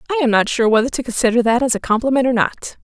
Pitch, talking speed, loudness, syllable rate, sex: 245 Hz, 275 wpm, -16 LUFS, 7.0 syllables/s, female